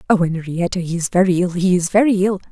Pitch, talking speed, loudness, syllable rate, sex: 180 Hz, 215 wpm, -17 LUFS, 6.3 syllables/s, female